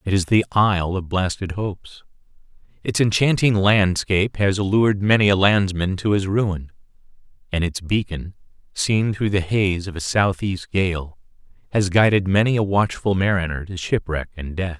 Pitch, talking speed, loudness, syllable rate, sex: 95 Hz, 160 wpm, -20 LUFS, 4.8 syllables/s, male